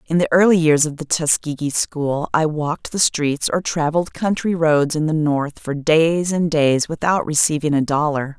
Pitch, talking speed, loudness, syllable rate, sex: 155 Hz, 195 wpm, -18 LUFS, 4.7 syllables/s, female